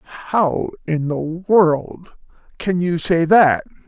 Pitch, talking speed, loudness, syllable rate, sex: 170 Hz, 125 wpm, -18 LUFS, 3.3 syllables/s, male